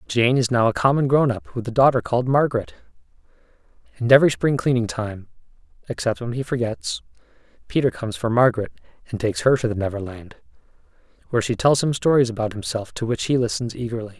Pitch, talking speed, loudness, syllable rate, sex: 115 Hz, 180 wpm, -21 LUFS, 6.5 syllables/s, male